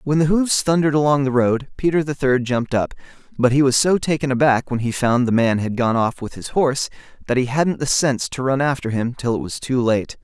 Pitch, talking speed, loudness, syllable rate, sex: 135 Hz, 250 wpm, -19 LUFS, 5.8 syllables/s, male